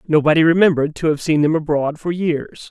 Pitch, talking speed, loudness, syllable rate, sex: 160 Hz, 200 wpm, -17 LUFS, 5.8 syllables/s, male